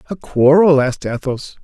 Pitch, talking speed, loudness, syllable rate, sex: 145 Hz, 145 wpm, -15 LUFS, 4.8 syllables/s, male